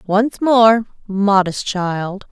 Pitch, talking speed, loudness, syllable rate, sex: 205 Hz, 105 wpm, -16 LUFS, 2.7 syllables/s, female